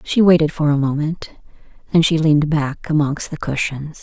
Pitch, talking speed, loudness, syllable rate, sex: 150 Hz, 180 wpm, -17 LUFS, 5.2 syllables/s, female